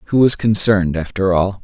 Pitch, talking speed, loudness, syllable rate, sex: 100 Hz, 185 wpm, -15 LUFS, 5.0 syllables/s, male